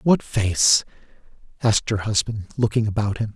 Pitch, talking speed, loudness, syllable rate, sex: 110 Hz, 145 wpm, -21 LUFS, 5.1 syllables/s, male